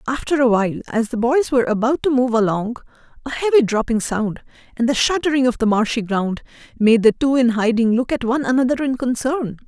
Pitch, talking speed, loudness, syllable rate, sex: 245 Hz, 205 wpm, -18 LUFS, 5.9 syllables/s, female